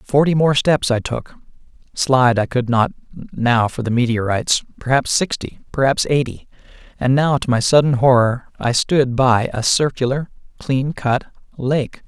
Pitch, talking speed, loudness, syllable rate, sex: 130 Hz, 145 wpm, -17 LUFS, 3.9 syllables/s, male